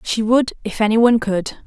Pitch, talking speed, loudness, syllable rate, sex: 230 Hz, 180 wpm, -17 LUFS, 5.1 syllables/s, female